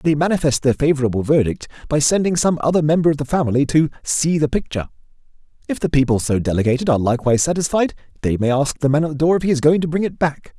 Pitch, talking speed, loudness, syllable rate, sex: 145 Hz, 230 wpm, -18 LUFS, 7.1 syllables/s, male